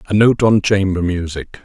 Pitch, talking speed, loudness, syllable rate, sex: 100 Hz, 185 wpm, -15 LUFS, 4.6 syllables/s, male